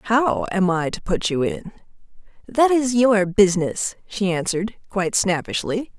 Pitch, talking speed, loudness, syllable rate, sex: 205 Hz, 150 wpm, -20 LUFS, 4.5 syllables/s, female